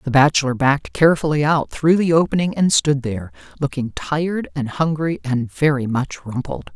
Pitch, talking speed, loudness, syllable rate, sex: 140 Hz, 170 wpm, -19 LUFS, 5.3 syllables/s, female